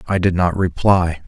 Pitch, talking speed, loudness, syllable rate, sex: 90 Hz, 190 wpm, -17 LUFS, 4.6 syllables/s, male